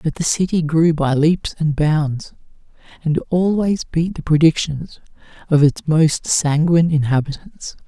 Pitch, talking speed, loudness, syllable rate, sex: 160 Hz, 135 wpm, -17 LUFS, 4.1 syllables/s, male